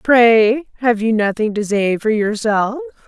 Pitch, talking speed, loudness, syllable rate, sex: 230 Hz, 155 wpm, -16 LUFS, 3.8 syllables/s, female